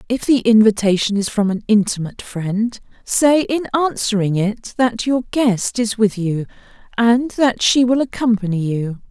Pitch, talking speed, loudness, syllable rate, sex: 220 Hz, 160 wpm, -17 LUFS, 4.4 syllables/s, female